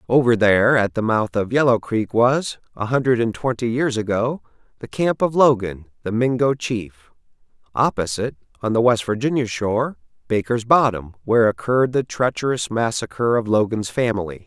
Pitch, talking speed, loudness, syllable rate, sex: 115 Hz, 160 wpm, -20 LUFS, 5.2 syllables/s, male